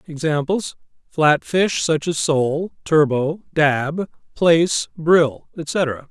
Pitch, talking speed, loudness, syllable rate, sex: 155 Hz, 100 wpm, -19 LUFS, 3.0 syllables/s, male